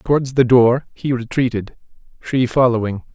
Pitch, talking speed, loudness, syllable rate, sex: 125 Hz, 135 wpm, -17 LUFS, 5.0 syllables/s, male